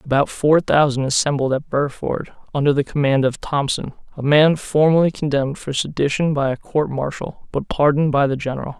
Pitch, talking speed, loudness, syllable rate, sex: 145 Hz, 175 wpm, -19 LUFS, 5.5 syllables/s, male